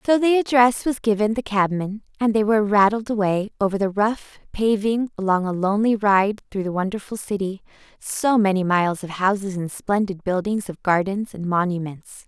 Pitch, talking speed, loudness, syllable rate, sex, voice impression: 205 Hz, 170 wpm, -21 LUFS, 5.1 syllables/s, female, very feminine, very middle-aged, very thin, tensed, very powerful, very bright, slightly soft, very clear, fluent, slightly cute, intellectual, slightly refreshing, sincere, calm, slightly friendly, slightly reassuring, very unique, elegant, slightly wild, slightly sweet, lively, strict, intense, very sharp, very light